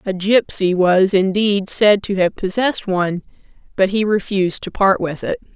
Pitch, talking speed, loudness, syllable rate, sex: 195 Hz, 175 wpm, -17 LUFS, 4.9 syllables/s, female